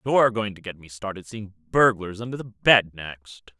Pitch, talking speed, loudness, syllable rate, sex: 105 Hz, 200 wpm, -22 LUFS, 4.9 syllables/s, male